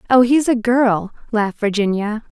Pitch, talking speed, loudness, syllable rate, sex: 225 Hz, 150 wpm, -17 LUFS, 4.8 syllables/s, female